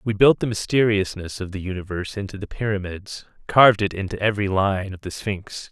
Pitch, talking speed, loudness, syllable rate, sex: 100 Hz, 190 wpm, -22 LUFS, 5.8 syllables/s, male